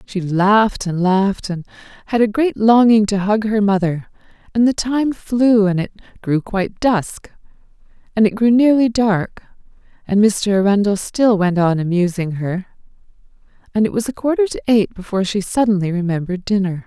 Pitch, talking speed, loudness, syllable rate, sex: 205 Hz, 165 wpm, -17 LUFS, 5.0 syllables/s, female